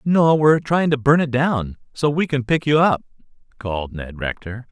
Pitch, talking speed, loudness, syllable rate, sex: 135 Hz, 205 wpm, -19 LUFS, 4.9 syllables/s, male